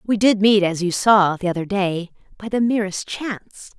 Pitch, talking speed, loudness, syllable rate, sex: 200 Hz, 205 wpm, -19 LUFS, 4.8 syllables/s, female